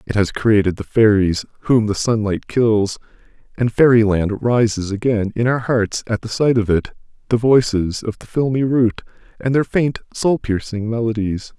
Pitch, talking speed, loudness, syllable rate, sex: 110 Hz, 170 wpm, -18 LUFS, 4.8 syllables/s, male